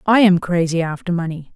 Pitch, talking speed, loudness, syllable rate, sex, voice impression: 175 Hz, 195 wpm, -18 LUFS, 5.6 syllables/s, female, feminine, adult-like, slightly relaxed, slightly weak, muffled, slightly halting, intellectual, calm, friendly, reassuring, elegant, modest